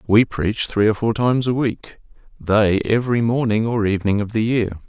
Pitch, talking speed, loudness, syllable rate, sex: 110 Hz, 195 wpm, -19 LUFS, 5.2 syllables/s, male